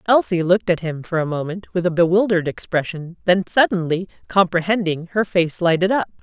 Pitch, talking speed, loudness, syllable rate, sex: 180 Hz, 175 wpm, -19 LUFS, 5.7 syllables/s, female